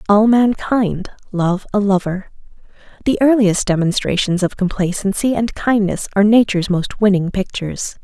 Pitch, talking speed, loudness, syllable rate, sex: 200 Hz, 125 wpm, -16 LUFS, 5.0 syllables/s, female